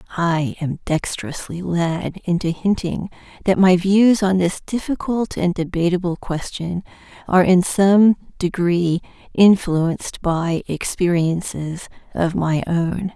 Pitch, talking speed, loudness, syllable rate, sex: 180 Hz, 115 wpm, -19 LUFS, 3.9 syllables/s, female